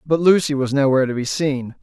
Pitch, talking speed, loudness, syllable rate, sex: 140 Hz, 230 wpm, -18 LUFS, 6.0 syllables/s, male